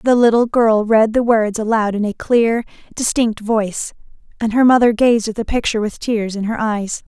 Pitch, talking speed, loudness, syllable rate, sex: 225 Hz, 200 wpm, -16 LUFS, 5.0 syllables/s, female